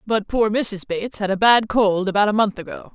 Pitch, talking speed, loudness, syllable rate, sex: 210 Hz, 245 wpm, -19 LUFS, 5.4 syllables/s, female